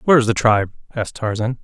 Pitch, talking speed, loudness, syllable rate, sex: 115 Hz, 220 wpm, -19 LUFS, 7.6 syllables/s, male